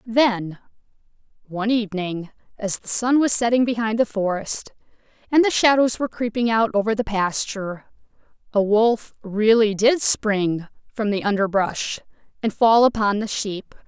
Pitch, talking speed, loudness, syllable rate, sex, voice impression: 215 Hz, 145 wpm, -21 LUFS, 4.6 syllables/s, female, feminine, slightly adult-like, slightly tensed, slightly powerful, intellectual, slightly calm, slightly lively